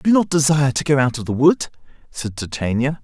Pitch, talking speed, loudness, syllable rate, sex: 140 Hz, 220 wpm, -18 LUFS, 5.8 syllables/s, male